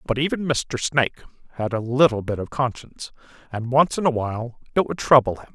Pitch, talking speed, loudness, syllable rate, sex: 125 Hz, 205 wpm, -22 LUFS, 5.7 syllables/s, male